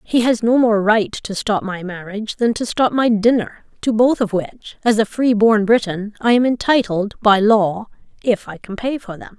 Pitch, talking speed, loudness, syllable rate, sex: 215 Hz, 215 wpm, -17 LUFS, 4.8 syllables/s, female